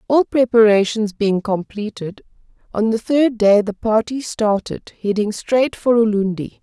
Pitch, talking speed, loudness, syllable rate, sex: 220 Hz, 135 wpm, -17 LUFS, 4.3 syllables/s, female